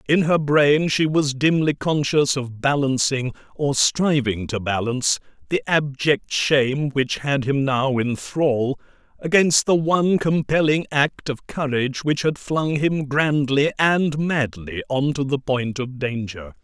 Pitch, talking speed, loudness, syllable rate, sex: 140 Hz, 150 wpm, -20 LUFS, 3.9 syllables/s, male